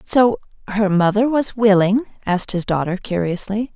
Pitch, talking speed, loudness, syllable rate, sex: 205 Hz, 145 wpm, -18 LUFS, 5.0 syllables/s, female